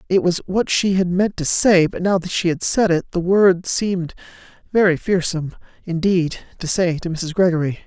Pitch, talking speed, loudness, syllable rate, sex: 180 Hz, 190 wpm, -18 LUFS, 5.1 syllables/s, female